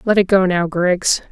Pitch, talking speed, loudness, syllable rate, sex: 185 Hz, 230 wpm, -16 LUFS, 4.4 syllables/s, female